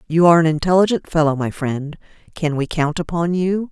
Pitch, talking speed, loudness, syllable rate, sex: 165 Hz, 195 wpm, -18 LUFS, 5.7 syllables/s, female